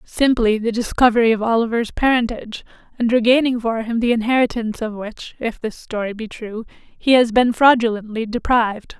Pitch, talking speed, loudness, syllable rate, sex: 230 Hz, 160 wpm, -18 LUFS, 5.4 syllables/s, female